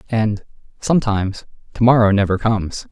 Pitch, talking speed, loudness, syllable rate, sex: 110 Hz, 80 wpm, -17 LUFS, 5.7 syllables/s, male